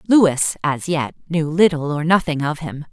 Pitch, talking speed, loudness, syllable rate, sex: 155 Hz, 185 wpm, -19 LUFS, 4.4 syllables/s, female